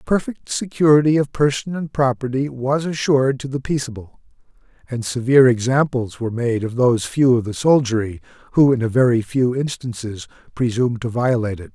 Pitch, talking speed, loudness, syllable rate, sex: 125 Hz, 165 wpm, -19 LUFS, 5.6 syllables/s, male